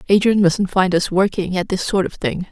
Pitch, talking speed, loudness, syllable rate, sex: 190 Hz, 240 wpm, -18 LUFS, 5.2 syllables/s, female